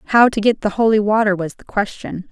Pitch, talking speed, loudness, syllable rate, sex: 210 Hz, 235 wpm, -17 LUFS, 5.3 syllables/s, female